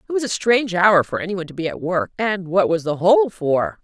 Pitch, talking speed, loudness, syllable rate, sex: 195 Hz, 280 wpm, -19 LUFS, 5.8 syllables/s, female